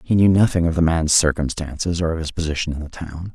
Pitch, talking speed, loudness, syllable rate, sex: 80 Hz, 250 wpm, -19 LUFS, 6.2 syllables/s, male